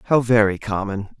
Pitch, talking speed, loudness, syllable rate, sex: 110 Hz, 150 wpm, -19 LUFS, 5.5 syllables/s, male